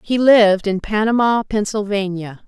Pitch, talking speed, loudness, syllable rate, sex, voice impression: 210 Hz, 120 wpm, -16 LUFS, 4.7 syllables/s, female, very feminine, slightly young, adult-like, thin, tensed, powerful, bright, very hard, very clear, fluent, slightly raspy, cool, intellectual, very refreshing, sincere, calm, friendly, slightly reassuring, unique, slightly elegant, wild, slightly sweet, lively, strict, slightly intense, sharp